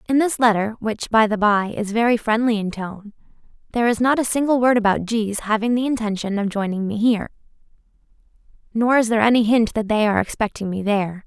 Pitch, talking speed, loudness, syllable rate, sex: 220 Hz, 200 wpm, -20 LUFS, 6.1 syllables/s, female